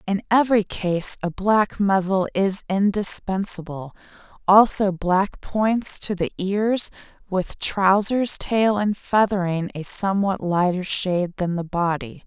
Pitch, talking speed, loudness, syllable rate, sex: 195 Hz, 125 wpm, -21 LUFS, 3.9 syllables/s, female